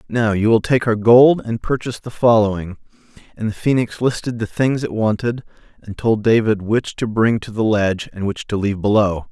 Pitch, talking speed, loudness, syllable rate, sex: 110 Hz, 205 wpm, -18 LUFS, 5.3 syllables/s, male